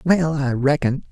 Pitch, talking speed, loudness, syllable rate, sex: 145 Hz, 160 wpm, -20 LUFS, 4.1 syllables/s, male